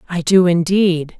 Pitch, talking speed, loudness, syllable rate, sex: 175 Hz, 150 wpm, -15 LUFS, 4.3 syllables/s, female